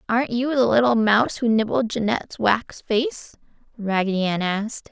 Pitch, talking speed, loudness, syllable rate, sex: 225 Hz, 160 wpm, -21 LUFS, 5.2 syllables/s, female